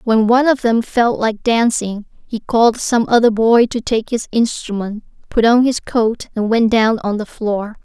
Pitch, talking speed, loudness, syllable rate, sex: 225 Hz, 200 wpm, -15 LUFS, 4.4 syllables/s, female